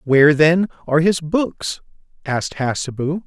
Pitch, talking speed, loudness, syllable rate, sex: 155 Hz, 130 wpm, -18 LUFS, 4.7 syllables/s, male